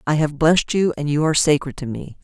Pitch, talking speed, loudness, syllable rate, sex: 150 Hz, 270 wpm, -19 LUFS, 6.3 syllables/s, female